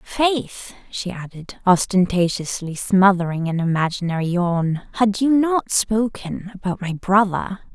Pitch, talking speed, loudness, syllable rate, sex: 195 Hz, 115 wpm, -20 LUFS, 4.1 syllables/s, female